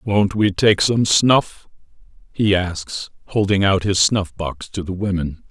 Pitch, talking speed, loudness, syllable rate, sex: 95 Hz, 165 wpm, -18 LUFS, 3.7 syllables/s, male